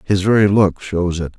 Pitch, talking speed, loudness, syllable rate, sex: 95 Hz, 215 wpm, -16 LUFS, 4.7 syllables/s, male